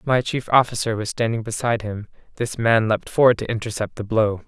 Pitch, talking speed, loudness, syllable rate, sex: 115 Hz, 200 wpm, -21 LUFS, 5.9 syllables/s, male